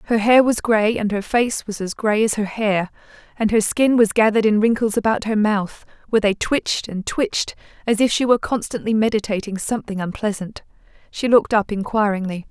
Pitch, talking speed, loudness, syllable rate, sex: 215 Hz, 190 wpm, -19 LUFS, 5.6 syllables/s, female